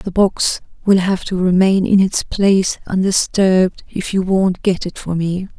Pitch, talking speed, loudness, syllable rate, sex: 185 Hz, 185 wpm, -16 LUFS, 4.3 syllables/s, female